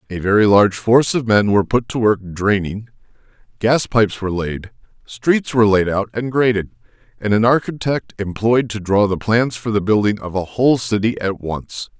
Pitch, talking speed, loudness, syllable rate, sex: 110 Hz, 190 wpm, -17 LUFS, 5.2 syllables/s, male